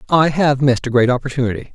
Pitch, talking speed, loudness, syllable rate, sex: 135 Hz, 205 wpm, -16 LUFS, 7.1 syllables/s, male